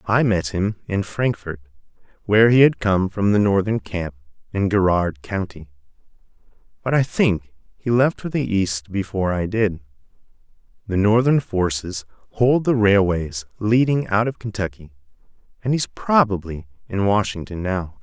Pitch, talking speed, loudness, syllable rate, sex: 100 Hz, 145 wpm, -20 LUFS, 4.6 syllables/s, male